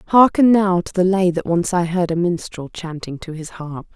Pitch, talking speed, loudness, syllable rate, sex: 175 Hz, 230 wpm, -18 LUFS, 5.0 syllables/s, female